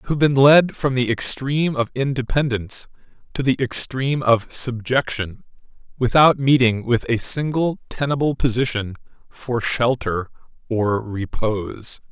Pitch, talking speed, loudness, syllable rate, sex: 125 Hz, 125 wpm, -20 LUFS, 4.5 syllables/s, male